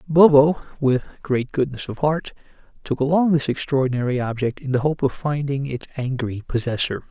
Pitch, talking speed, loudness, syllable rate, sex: 135 Hz, 160 wpm, -21 LUFS, 5.2 syllables/s, male